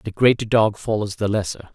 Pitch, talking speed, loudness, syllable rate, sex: 105 Hz, 205 wpm, -20 LUFS, 5.5 syllables/s, male